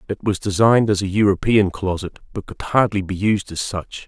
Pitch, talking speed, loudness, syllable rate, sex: 100 Hz, 205 wpm, -19 LUFS, 5.3 syllables/s, male